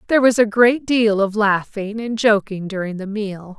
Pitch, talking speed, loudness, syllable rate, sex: 215 Hz, 200 wpm, -18 LUFS, 4.7 syllables/s, female